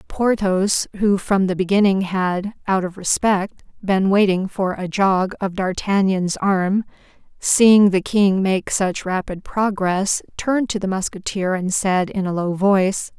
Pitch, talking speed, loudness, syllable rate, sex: 195 Hz, 155 wpm, -19 LUFS, 4.0 syllables/s, female